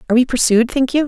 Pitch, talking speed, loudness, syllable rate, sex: 250 Hz, 280 wpm, -15 LUFS, 7.5 syllables/s, female